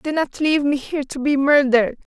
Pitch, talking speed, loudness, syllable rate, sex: 280 Hz, 225 wpm, -19 LUFS, 6.1 syllables/s, female